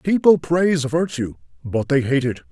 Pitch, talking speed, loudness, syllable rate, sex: 150 Hz, 165 wpm, -19 LUFS, 4.7 syllables/s, male